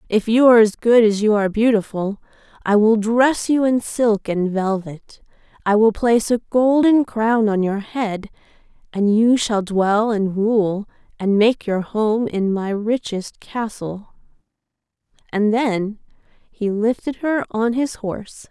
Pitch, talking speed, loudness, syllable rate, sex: 220 Hz, 155 wpm, -18 LUFS, 4.0 syllables/s, female